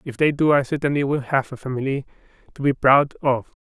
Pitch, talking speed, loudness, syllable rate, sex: 135 Hz, 215 wpm, -21 LUFS, 5.9 syllables/s, male